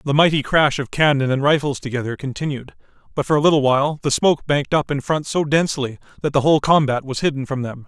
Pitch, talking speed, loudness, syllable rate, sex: 140 Hz, 230 wpm, -19 LUFS, 6.5 syllables/s, male